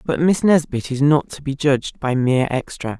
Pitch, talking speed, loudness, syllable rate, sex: 140 Hz, 220 wpm, -19 LUFS, 5.1 syllables/s, female